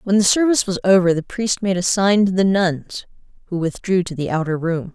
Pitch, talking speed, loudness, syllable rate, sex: 185 Hz, 230 wpm, -18 LUFS, 5.5 syllables/s, female